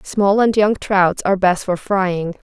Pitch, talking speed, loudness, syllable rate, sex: 195 Hz, 190 wpm, -17 LUFS, 4.0 syllables/s, female